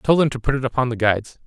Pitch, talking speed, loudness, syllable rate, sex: 125 Hz, 330 wpm, -20 LUFS, 7.2 syllables/s, male